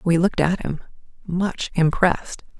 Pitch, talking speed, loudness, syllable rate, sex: 175 Hz, 140 wpm, -22 LUFS, 4.7 syllables/s, female